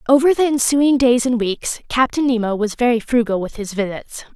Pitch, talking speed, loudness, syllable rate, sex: 240 Hz, 195 wpm, -17 LUFS, 5.2 syllables/s, female